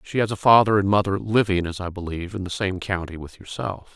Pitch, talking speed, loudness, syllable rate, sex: 95 Hz, 240 wpm, -22 LUFS, 6.0 syllables/s, male